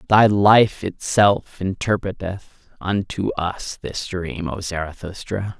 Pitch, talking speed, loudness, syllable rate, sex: 95 Hz, 105 wpm, -21 LUFS, 3.6 syllables/s, male